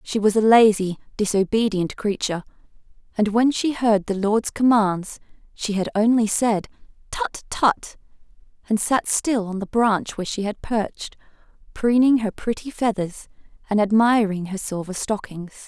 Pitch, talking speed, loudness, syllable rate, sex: 215 Hz, 145 wpm, -21 LUFS, 4.6 syllables/s, female